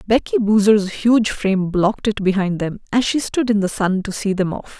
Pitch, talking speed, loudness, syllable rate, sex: 205 Hz, 225 wpm, -18 LUFS, 5.1 syllables/s, female